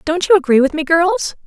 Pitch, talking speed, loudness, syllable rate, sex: 330 Hz, 245 wpm, -14 LUFS, 5.4 syllables/s, female